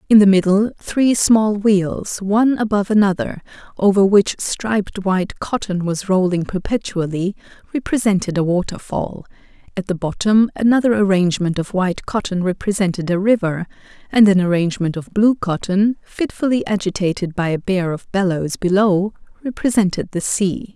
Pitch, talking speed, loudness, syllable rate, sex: 195 Hz, 140 wpm, -18 LUFS, 5.1 syllables/s, female